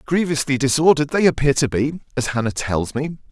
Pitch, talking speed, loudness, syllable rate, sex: 140 Hz, 180 wpm, -19 LUFS, 5.8 syllables/s, male